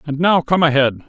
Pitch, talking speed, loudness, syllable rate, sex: 150 Hz, 220 wpm, -15 LUFS, 6.0 syllables/s, male